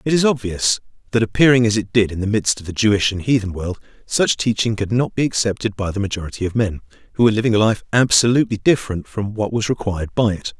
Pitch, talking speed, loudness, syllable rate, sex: 110 Hz, 230 wpm, -18 LUFS, 6.6 syllables/s, male